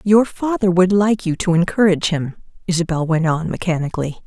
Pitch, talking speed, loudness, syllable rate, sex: 180 Hz, 170 wpm, -18 LUFS, 5.7 syllables/s, female